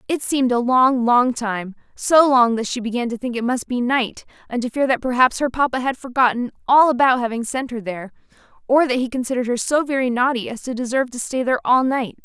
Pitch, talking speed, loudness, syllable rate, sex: 250 Hz, 235 wpm, -19 LUFS, 6.0 syllables/s, female